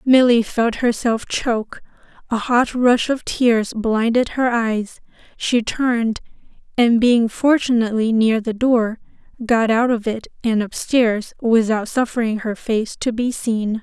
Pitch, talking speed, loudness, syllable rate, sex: 230 Hz, 145 wpm, -18 LUFS, 4.0 syllables/s, female